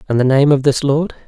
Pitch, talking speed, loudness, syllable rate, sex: 140 Hz, 285 wpm, -14 LUFS, 6.1 syllables/s, male